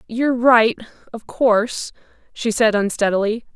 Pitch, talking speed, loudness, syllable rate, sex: 225 Hz, 100 wpm, -18 LUFS, 4.8 syllables/s, female